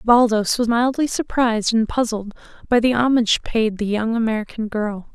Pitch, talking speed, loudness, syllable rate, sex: 225 Hz, 165 wpm, -19 LUFS, 5.1 syllables/s, female